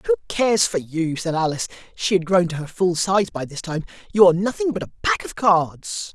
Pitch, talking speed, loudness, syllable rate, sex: 180 Hz, 225 wpm, -21 LUFS, 4.1 syllables/s, male